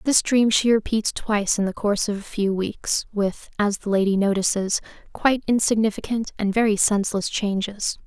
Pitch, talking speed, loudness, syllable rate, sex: 210 Hz, 155 wpm, -22 LUFS, 5.2 syllables/s, female